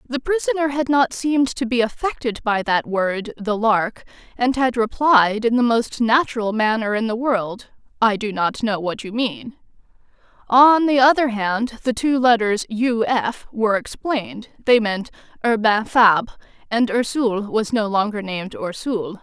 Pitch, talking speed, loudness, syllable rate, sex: 230 Hz, 165 wpm, -19 LUFS, 4.6 syllables/s, female